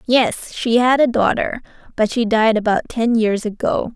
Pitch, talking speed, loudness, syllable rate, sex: 230 Hz, 180 wpm, -17 LUFS, 4.4 syllables/s, female